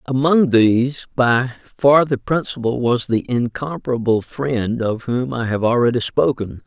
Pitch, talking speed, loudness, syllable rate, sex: 125 Hz, 145 wpm, -18 LUFS, 4.3 syllables/s, male